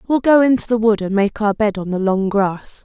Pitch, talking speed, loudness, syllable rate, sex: 215 Hz, 275 wpm, -17 LUFS, 5.2 syllables/s, female